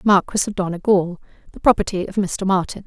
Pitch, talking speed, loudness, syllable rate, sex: 190 Hz, 170 wpm, -20 LUFS, 5.9 syllables/s, female